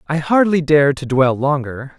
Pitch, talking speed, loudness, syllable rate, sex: 145 Hz, 180 wpm, -15 LUFS, 4.4 syllables/s, male